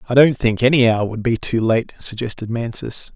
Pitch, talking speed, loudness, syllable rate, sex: 120 Hz, 210 wpm, -18 LUFS, 5.2 syllables/s, male